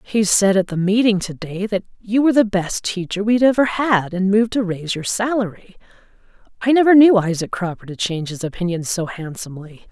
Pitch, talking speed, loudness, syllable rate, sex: 200 Hz, 200 wpm, -18 LUFS, 5.8 syllables/s, female